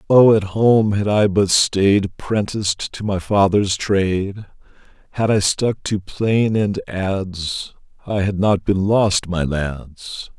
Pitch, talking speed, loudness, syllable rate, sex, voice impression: 100 Hz, 150 wpm, -18 LUFS, 3.6 syllables/s, male, masculine, very adult-like, cool, sincere, slightly calm, slightly wild